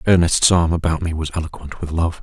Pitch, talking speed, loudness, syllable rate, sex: 80 Hz, 215 wpm, -18 LUFS, 5.9 syllables/s, male